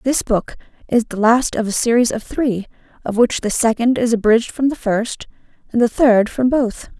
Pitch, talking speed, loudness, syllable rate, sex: 235 Hz, 205 wpm, -17 LUFS, 4.9 syllables/s, female